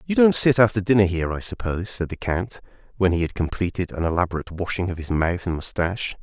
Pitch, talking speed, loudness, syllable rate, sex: 95 Hz, 220 wpm, -22 LUFS, 6.6 syllables/s, male